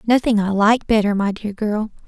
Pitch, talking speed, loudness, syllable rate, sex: 215 Hz, 200 wpm, -18 LUFS, 5.0 syllables/s, female